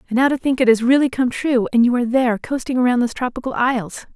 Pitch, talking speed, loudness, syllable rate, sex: 250 Hz, 260 wpm, -18 LUFS, 6.9 syllables/s, female